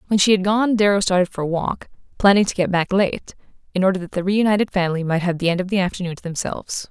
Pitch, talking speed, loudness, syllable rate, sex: 190 Hz, 250 wpm, -19 LUFS, 6.8 syllables/s, female